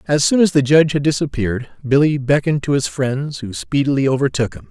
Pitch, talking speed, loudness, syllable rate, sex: 135 Hz, 205 wpm, -17 LUFS, 6.1 syllables/s, male